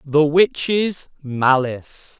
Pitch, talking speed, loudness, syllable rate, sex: 150 Hz, 80 wpm, -18 LUFS, 2.5 syllables/s, male